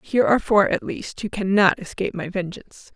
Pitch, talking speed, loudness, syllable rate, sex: 195 Hz, 205 wpm, -21 LUFS, 6.0 syllables/s, female